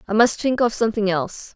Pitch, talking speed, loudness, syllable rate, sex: 220 Hz, 230 wpm, -20 LUFS, 6.5 syllables/s, female